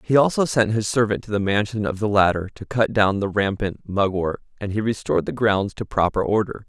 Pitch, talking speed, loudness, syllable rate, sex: 105 Hz, 225 wpm, -21 LUFS, 5.6 syllables/s, male